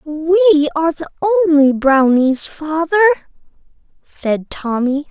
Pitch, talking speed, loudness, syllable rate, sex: 315 Hz, 95 wpm, -15 LUFS, 4.3 syllables/s, female